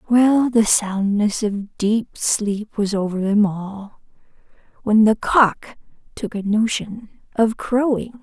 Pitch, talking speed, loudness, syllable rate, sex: 215 Hz, 130 wpm, -19 LUFS, 3.4 syllables/s, female